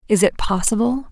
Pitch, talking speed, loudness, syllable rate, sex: 220 Hz, 160 wpm, -19 LUFS, 5.5 syllables/s, female